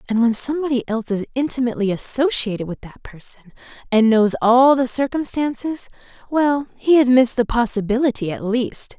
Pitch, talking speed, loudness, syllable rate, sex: 245 Hz, 140 wpm, -19 LUFS, 5.4 syllables/s, female